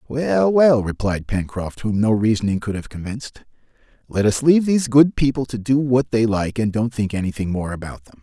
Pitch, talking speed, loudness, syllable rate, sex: 115 Hz, 205 wpm, -19 LUFS, 5.4 syllables/s, male